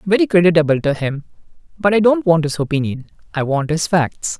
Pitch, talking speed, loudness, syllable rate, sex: 170 Hz, 180 wpm, -16 LUFS, 5.8 syllables/s, male